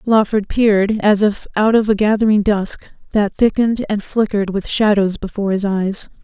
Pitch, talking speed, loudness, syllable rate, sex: 205 Hz, 175 wpm, -16 LUFS, 5.1 syllables/s, female